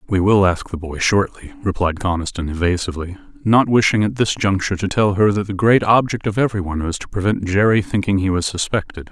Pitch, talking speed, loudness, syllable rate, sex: 100 Hz, 205 wpm, -18 LUFS, 6.0 syllables/s, male